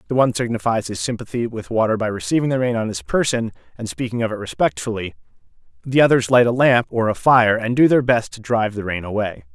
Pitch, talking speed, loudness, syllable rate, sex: 115 Hz, 225 wpm, -19 LUFS, 6.3 syllables/s, male